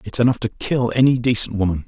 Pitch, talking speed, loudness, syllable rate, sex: 115 Hz, 225 wpm, -18 LUFS, 6.4 syllables/s, male